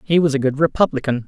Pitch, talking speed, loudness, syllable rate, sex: 145 Hz, 235 wpm, -18 LUFS, 6.8 syllables/s, male